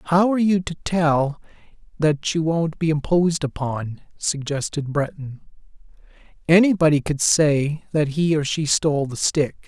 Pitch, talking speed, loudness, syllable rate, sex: 155 Hz, 145 wpm, -20 LUFS, 4.4 syllables/s, male